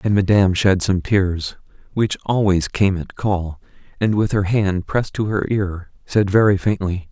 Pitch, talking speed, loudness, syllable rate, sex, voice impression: 95 Hz, 175 wpm, -19 LUFS, 4.5 syllables/s, male, masculine, adult-like, cool, sincere, calm, kind